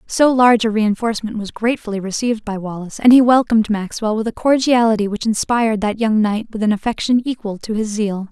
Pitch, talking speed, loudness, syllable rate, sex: 220 Hz, 200 wpm, -17 LUFS, 6.2 syllables/s, female